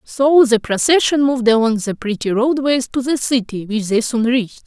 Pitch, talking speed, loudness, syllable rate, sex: 245 Hz, 195 wpm, -16 LUFS, 5.1 syllables/s, female